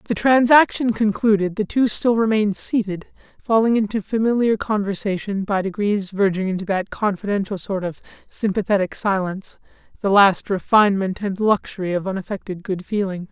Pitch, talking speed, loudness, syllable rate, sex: 205 Hz, 140 wpm, -20 LUFS, 5.3 syllables/s, male